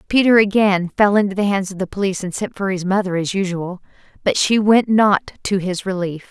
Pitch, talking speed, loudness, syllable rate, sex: 195 Hz, 220 wpm, -18 LUFS, 5.5 syllables/s, female